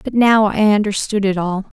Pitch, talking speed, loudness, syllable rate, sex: 205 Hz, 200 wpm, -16 LUFS, 4.9 syllables/s, female